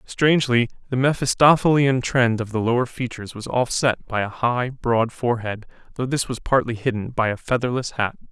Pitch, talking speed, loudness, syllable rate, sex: 120 Hz, 175 wpm, -21 LUFS, 5.3 syllables/s, male